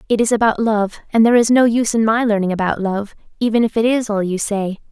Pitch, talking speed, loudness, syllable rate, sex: 220 Hz, 255 wpm, -16 LUFS, 6.3 syllables/s, female